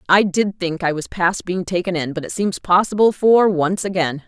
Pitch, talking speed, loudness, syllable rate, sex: 180 Hz, 225 wpm, -18 LUFS, 4.9 syllables/s, female